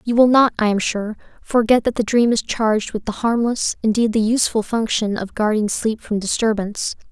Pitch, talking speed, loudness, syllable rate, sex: 220 Hz, 200 wpm, -18 LUFS, 5.3 syllables/s, female